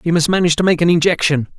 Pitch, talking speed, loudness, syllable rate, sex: 165 Hz, 265 wpm, -14 LUFS, 7.5 syllables/s, male